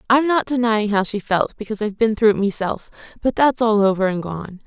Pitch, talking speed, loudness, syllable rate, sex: 215 Hz, 230 wpm, -19 LUFS, 5.8 syllables/s, female